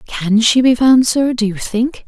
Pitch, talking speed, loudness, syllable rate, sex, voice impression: 235 Hz, 230 wpm, -13 LUFS, 4.2 syllables/s, female, very feminine, slightly adult-like, thin, tensed, powerful, bright, slightly soft, clear, fluent, slightly cute, cool, intellectual, very refreshing, sincere, slightly calm, slightly friendly, slightly reassuring, unique, slightly elegant, very wild, sweet, slightly lively, slightly strict, slightly intense, light